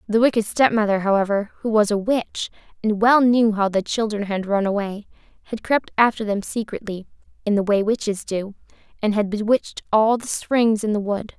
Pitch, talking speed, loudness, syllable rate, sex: 215 Hz, 190 wpm, -21 LUFS, 5.2 syllables/s, female